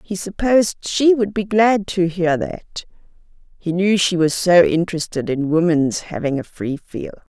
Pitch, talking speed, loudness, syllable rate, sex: 180 Hz, 165 wpm, -18 LUFS, 4.4 syllables/s, female